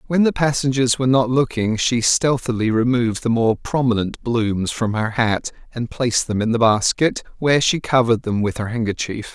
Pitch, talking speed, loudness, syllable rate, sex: 120 Hz, 185 wpm, -19 LUFS, 5.2 syllables/s, male